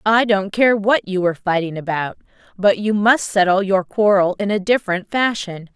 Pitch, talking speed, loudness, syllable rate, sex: 200 Hz, 190 wpm, -18 LUFS, 5.0 syllables/s, female